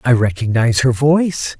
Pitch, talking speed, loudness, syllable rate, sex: 130 Hz, 150 wpm, -15 LUFS, 5.4 syllables/s, male